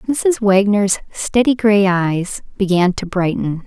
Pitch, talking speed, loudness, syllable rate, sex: 200 Hz, 130 wpm, -16 LUFS, 3.6 syllables/s, female